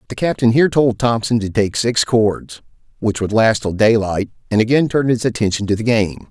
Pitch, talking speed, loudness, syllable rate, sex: 115 Hz, 200 wpm, -16 LUFS, 5.5 syllables/s, male